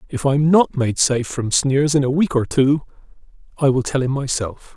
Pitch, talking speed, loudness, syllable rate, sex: 135 Hz, 225 wpm, -18 LUFS, 5.2 syllables/s, male